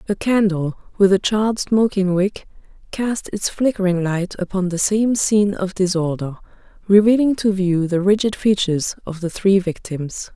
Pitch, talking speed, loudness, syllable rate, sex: 195 Hz, 155 wpm, -19 LUFS, 4.8 syllables/s, female